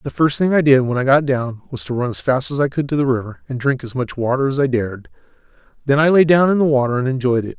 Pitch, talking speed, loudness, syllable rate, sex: 135 Hz, 300 wpm, -17 LUFS, 6.5 syllables/s, male